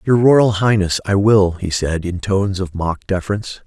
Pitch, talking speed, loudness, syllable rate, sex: 100 Hz, 195 wpm, -17 LUFS, 4.9 syllables/s, male